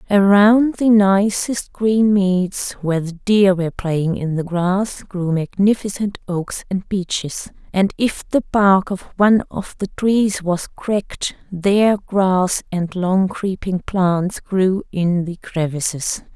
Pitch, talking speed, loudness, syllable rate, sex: 190 Hz, 145 wpm, -18 LUFS, 3.5 syllables/s, female